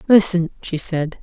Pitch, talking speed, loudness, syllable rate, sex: 175 Hz, 145 wpm, -18 LUFS, 4.3 syllables/s, female